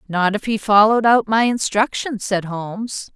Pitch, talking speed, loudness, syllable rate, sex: 215 Hz, 170 wpm, -18 LUFS, 4.7 syllables/s, female